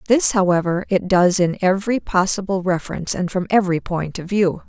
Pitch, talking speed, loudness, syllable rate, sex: 185 Hz, 180 wpm, -19 LUFS, 5.7 syllables/s, female